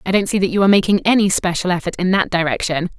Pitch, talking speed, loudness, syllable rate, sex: 185 Hz, 260 wpm, -16 LUFS, 7.1 syllables/s, female